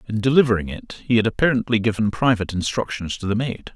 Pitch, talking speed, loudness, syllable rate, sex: 110 Hz, 190 wpm, -21 LUFS, 6.6 syllables/s, male